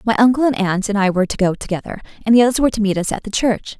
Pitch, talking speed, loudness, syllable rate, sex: 215 Hz, 315 wpm, -17 LUFS, 7.7 syllables/s, female